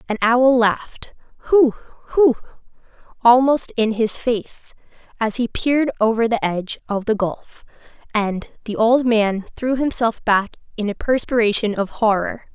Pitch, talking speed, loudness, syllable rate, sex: 230 Hz, 145 wpm, -19 LUFS, 4.3 syllables/s, female